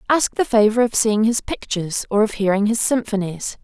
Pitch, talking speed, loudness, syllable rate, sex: 220 Hz, 200 wpm, -19 LUFS, 5.3 syllables/s, female